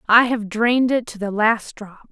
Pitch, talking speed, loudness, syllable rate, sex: 225 Hz, 225 wpm, -19 LUFS, 4.7 syllables/s, female